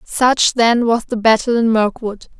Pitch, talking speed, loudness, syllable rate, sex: 225 Hz, 175 wpm, -15 LUFS, 4.1 syllables/s, female